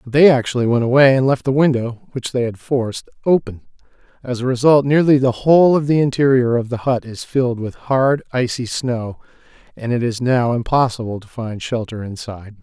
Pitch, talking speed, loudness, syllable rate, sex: 125 Hz, 195 wpm, -17 LUFS, 5.4 syllables/s, male